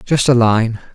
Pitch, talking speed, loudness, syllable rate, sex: 120 Hz, 190 wpm, -14 LUFS, 4.2 syllables/s, male